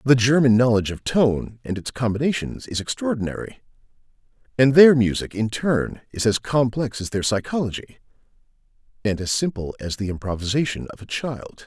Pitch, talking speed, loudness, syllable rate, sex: 120 Hz, 155 wpm, -21 LUFS, 5.3 syllables/s, male